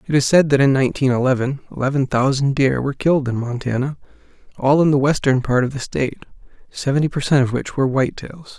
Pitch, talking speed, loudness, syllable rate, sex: 135 Hz, 210 wpm, -18 LUFS, 6.4 syllables/s, male